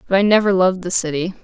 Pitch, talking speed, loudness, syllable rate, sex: 185 Hz, 250 wpm, -16 LUFS, 7.4 syllables/s, female